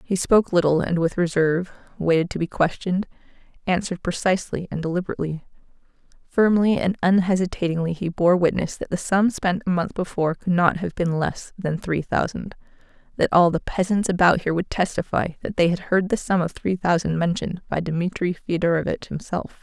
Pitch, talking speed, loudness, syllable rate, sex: 175 Hz, 175 wpm, -22 LUFS, 5.7 syllables/s, female